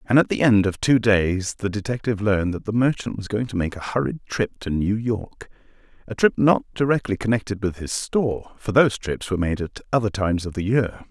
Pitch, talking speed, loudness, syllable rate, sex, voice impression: 105 Hz, 220 wpm, -22 LUFS, 5.7 syllables/s, male, very masculine, very adult-like, thick, cool, sincere, slightly wild